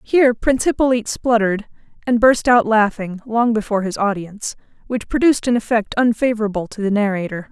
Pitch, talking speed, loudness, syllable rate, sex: 220 Hz, 160 wpm, -18 LUFS, 6.2 syllables/s, female